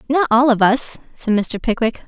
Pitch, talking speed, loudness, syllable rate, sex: 240 Hz, 200 wpm, -17 LUFS, 4.7 syllables/s, female